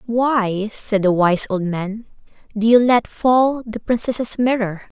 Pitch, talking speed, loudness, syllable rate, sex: 220 Hz, 155 wpm, -18 LUFS, 3.6 syllables/s, female